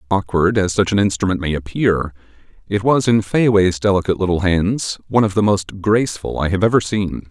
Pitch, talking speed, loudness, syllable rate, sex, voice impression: 100 Hz, 190 wpm, -17 LUFS, 5.6 syllables/s, male, very masculine, slightly old, very thick, very tensed, very powerful, bright, soft, slightly muffled, very fluent, very cool, very intellectual, refreshing, very sincere, very calm, very mature, very friendly, very reassuring, very unique, elegant, very wild, sweet, lively, kind